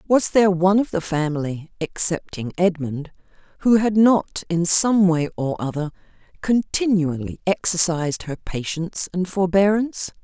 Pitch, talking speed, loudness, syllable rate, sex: 175 Hz, 130 wpm, -20 LUFS, 4.8 syllables/s, female